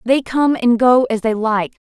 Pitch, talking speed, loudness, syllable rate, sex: 240 Hz, 215 wpm, -15 LUFS, 4.2 syllables/s, female